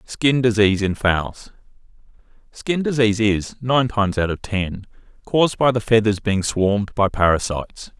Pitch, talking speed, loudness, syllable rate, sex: 110 Hz, 145 wpm, -19 LUFS, 4.8 syllables/s, male